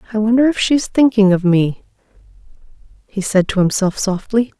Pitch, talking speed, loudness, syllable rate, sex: 210 Hz, 155 wpm, -15 LUFS, 5.2 syllables/s, female